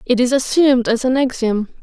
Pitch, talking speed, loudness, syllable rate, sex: 250 Hz, 195 wpm, -16 LUFS, 5.6 syllables/s, female